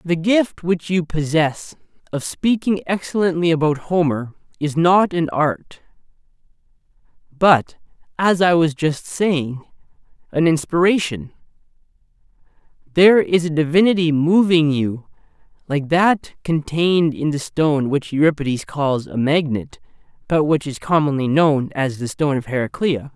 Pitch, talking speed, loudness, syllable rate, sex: 160 Hz, 125 wpm, -18 LUFS, 4.4 syllables/s, male